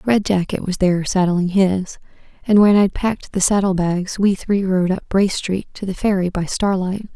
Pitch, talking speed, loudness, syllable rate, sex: 190 Hz, 200 wpm, -18 LUFS, 4.8 syllables/s, female